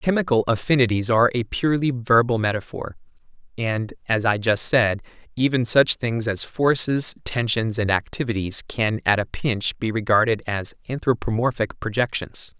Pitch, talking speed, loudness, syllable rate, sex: 115 Hz, 140 wpm, -21 LUFS, 4.8 syllables/s, male